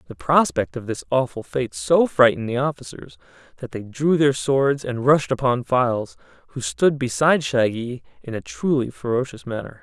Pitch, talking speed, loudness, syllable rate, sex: 125 Hz, 170 wpm, -21 LUFS, 5.0 syllables/s, male